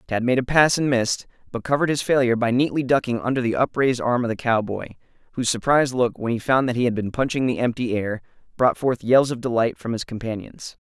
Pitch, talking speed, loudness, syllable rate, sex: 120 Hz, 230 wpm, -21 LUFS, 6.4 syllables/s, male